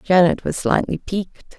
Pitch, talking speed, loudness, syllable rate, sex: 180 Hz, 150 wpm, -20 LUFS, 5.1 syllables/s, female